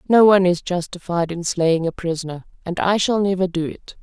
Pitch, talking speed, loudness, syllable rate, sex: 180 Hz, 210 wpm, -19 LUFS, 5.5 syllables/s, female